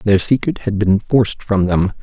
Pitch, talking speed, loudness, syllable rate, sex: 105 Hz, 205 wpm, -16 LUFS, 4.7 syllables/s, male